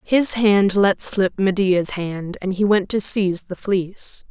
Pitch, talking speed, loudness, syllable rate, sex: 195 Hz, 180 wpm, -19 LUFS, 3.8 syllables/s, female